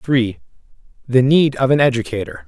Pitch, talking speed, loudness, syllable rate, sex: 130 Hz, 145 wpm, -16 LUFS, 5.1 syllables/s, male